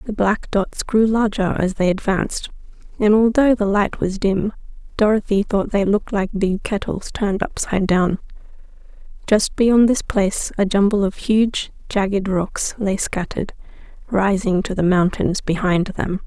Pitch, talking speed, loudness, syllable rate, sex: 200 Hz, 155 wpm, -19 LUFS, 4.6 syllables/s, female